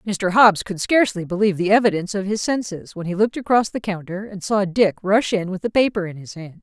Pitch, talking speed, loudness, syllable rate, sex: 195 Hz, 245 wpm, -20 LUFS, 5.9 syllables/s, female